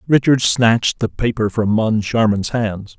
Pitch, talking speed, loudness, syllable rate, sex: 110 Hz, 140 wpm, -17 LUFS, 4.2 syllables/s, male